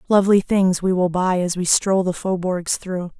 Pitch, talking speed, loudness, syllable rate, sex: 185 Hz, 205 wpm, -19 LUFS, 4.7 syllables/s, female